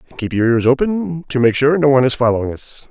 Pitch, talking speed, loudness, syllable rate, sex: 135 Hz, 270 wpm, -16 LUFS, 6.3 syllables/s, male